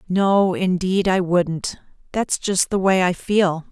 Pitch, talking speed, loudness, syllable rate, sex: 185 Hz, 160 wpm, -20 LUFS, 3.4 syllables/s, female